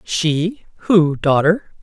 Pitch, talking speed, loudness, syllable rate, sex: 170 Hz, 100 wpm, -16 LUFS, 2.8 syllables/s, female